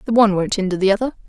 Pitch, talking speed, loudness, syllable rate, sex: 205 Hz, 280 wpm, -18 LUFS, 8.7 syllables/s, female